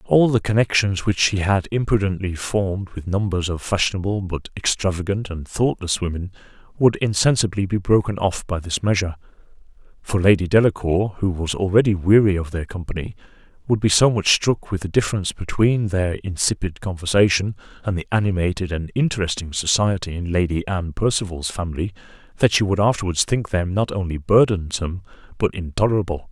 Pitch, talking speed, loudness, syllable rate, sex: 95 Hz, 155 wpm, -20 LUFS, 5.7 syllables/s, male